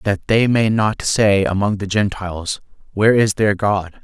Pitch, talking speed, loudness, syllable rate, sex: 100 Hz, 180 wpm, -17 LUFS, 4.5 syllables/s, male